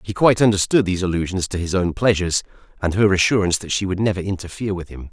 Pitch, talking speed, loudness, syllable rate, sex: 95 Hz, 225 wpm, -19 LUFS, 7.3 syllables/s, male